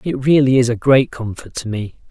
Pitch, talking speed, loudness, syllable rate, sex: 125 Hz, 230 wpm, -16 LUFS, 5.1 syllables/s, male